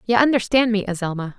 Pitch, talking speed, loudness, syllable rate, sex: 215 Hz, 175 wpm, -19 LUFS, 6.5 syllables/s, female